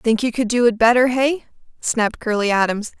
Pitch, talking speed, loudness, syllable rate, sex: 230 Hz, 200 wpm, -18 LUFS, 5.5 syllables/s, female